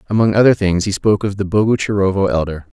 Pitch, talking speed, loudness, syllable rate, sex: 100 Hz, 195 wpm, -16 LUFS, 6.8 syllables/s, male